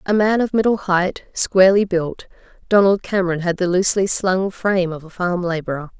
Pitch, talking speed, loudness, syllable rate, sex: 185 Hz, 180 wpm, -18 LUFS, 5.4 syllables/s, female